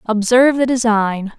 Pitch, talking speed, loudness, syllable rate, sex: 230 Hz, 130 wpm, -15 LUFS, 4.9 syllables/s, female